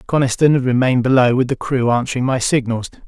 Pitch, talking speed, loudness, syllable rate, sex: 125 Hz, 195 wpm, -16 LUFS, 6.5 syllables/s, male